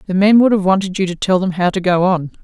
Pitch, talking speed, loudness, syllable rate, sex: 185 Hz, 320 wpm, -15 LUFS, 6.4 syllables/s, female